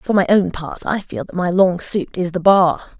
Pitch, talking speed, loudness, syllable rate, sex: 185 Hz, 260 wpm, -17 LUFS, 4.7 syllables/s, female